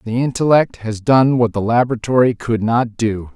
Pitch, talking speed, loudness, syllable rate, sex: 115 Hz, 180 wpm, -16 LUFS, 5.0 syllables/s, male